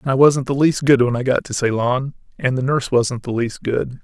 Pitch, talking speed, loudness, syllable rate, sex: 130 Hz, 265 wpm, -18 LUFS, 5.4 syllables/s, male